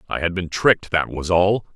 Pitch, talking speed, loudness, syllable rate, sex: 90 Hz, 240 wpm, -20 LUFS, 5.4 syllables/s, male